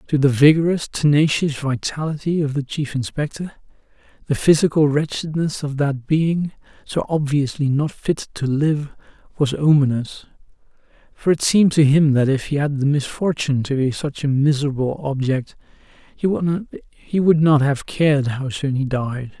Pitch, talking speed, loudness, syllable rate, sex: 145 Hz, 150 wpm, -19 LUFS, 4.7 syllables/s, male